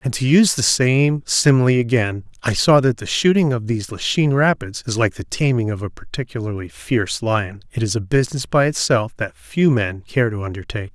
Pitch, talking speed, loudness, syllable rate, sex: 120 Hz, 205 wpm, -19 LUFS, 5.6 syllables/s, male